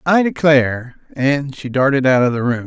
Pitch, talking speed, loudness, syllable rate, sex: 135 Hz, 205 wpm, -16 LUFS, 5.0 syllables/s, male